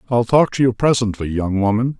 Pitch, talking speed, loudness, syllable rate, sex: 115 Hz, 210 wpm, -17 LUFS, 5.5 syllables/s, male